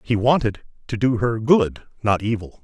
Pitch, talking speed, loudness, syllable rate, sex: 115 Hz, 180 wpm, -20 LUFS, 4.6 syllables/s, male